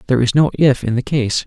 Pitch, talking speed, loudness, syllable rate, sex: 130 Hz, 285 wpm, -16 LUFS, 6.6 syllables/s, male